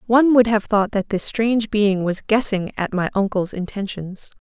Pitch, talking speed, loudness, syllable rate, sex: 205 Hz, 190 wpm, -20 LUFS, 4.9 syllables/s, female